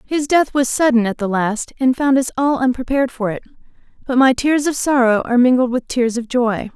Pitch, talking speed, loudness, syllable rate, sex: 255 Hz, 220 wpm, -17 LUFS, 5.5 syllables/s, female